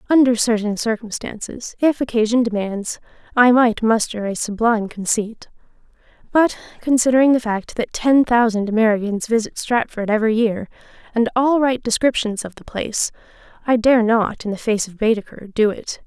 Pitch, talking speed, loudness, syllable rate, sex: 225 Hz, 155 wpm, -19 LUFS, 5.2 syllables/s, female